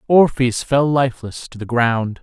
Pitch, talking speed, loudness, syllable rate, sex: 125 Hz, 160 wpm, -17 LUFS, 4.4 syllables/s, male